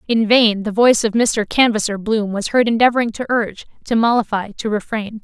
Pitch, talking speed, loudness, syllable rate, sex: 220 Hz, 195 wpm, -17 LUFS, 5.6 syllables/s, female